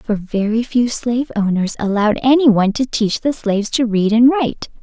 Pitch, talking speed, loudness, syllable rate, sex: 230 Hz, 185 wpm, -16 LUFS, 5.2 syllables/s, female